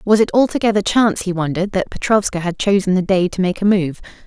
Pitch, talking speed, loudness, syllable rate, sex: 190 Hz, 225 wpm, -17 LUFS, 6.3 syllables/s, female